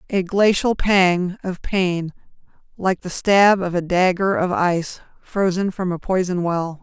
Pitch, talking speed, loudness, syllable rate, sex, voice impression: 185 Hz, 160 wpm, -19 LUFS, 4.2 syllables/s, female, feminine, very adult-like, intellectual, slightly calm, slightly sharp